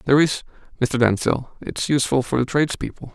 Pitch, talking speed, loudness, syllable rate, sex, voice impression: 130 Hz, 190 wpm, -21 LUFS, 6.1 syllables/s, male, masculine, adult-like, slightly thick, slightly dark, slightly fluent, slightly sincere, slightly calm, slightly modest